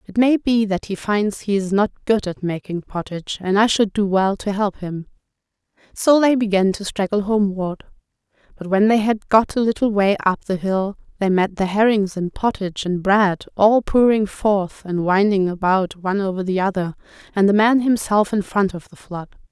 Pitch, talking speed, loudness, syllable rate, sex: 200 Hz, 200 wpm, -19 LUFS, 5.0 syllables/s, female